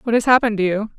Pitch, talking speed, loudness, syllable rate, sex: 220 Hz, 305 wpm, -17 LUFS, 7.8 syllables/s, female